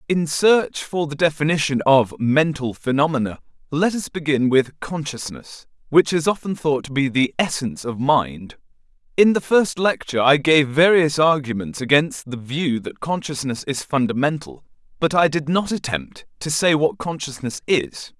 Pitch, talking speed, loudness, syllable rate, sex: 145 Hz, 160 wpm, -20 LUFS, 4.6 syllables/s, male